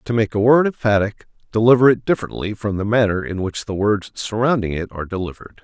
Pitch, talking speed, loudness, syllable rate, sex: 105 Hz, 200 wpm, -19 LUFS, 6.3 syllables/s, male